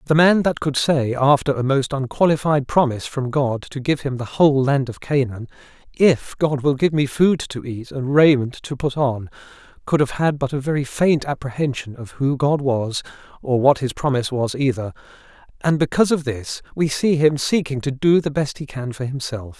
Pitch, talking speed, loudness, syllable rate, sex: 135 Hz, 205 wpm, -20 LUFS, 5.1 syllables/s, male